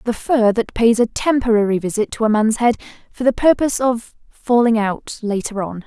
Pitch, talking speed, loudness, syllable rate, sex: 230 Hz, 195 wpm, -17 LUFS, 5.2 syllables/s, female